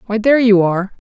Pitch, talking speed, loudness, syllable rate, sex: 215 Hz, 225 wpm, -14 LUFS, 7.4 syllables/s, female